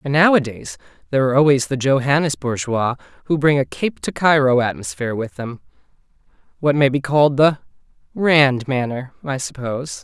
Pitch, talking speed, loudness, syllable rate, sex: 130 Hz, 145 wpm, -18 LUFS, 5.5 syllables/s, male